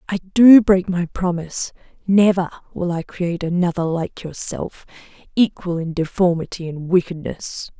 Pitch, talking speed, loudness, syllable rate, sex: 180 Hz, 130 wpm, -19 LUFS, 4.7 syllables/s, female